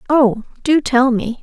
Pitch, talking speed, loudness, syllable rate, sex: 255 Hz, 170 wpm, -15 LUFS, 4.0 syllables/s, female